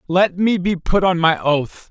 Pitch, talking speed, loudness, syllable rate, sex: 175 Hz, 220 wpm, -17 LUFS, 4.1 syllables/s, male